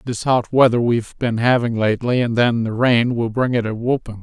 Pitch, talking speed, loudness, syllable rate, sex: 120 Hz, 225 wpm, -18 LUFS, 5.4 syllables/s, male